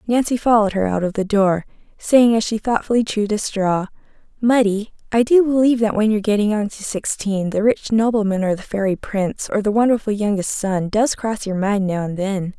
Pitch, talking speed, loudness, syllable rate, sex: 210 Hz, 210 wpm, -18 LUFS, 5.6 syllables/s, female